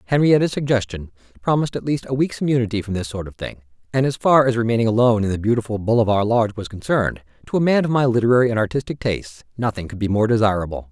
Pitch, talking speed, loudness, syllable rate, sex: 115 Hz, 220 wpm, -20 LUFS, 7.2 syllables/s, male